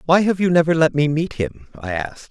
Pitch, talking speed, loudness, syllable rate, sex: 150 Hz, 260 wpm, -19 LUFS, 5.8 syllables/s, male